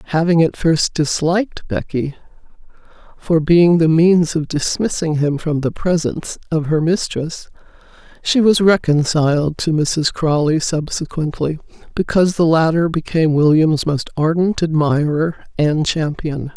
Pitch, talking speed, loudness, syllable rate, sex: 160 Hz, 125 wpm, -16 LUFS, 4.4 syllables/s, female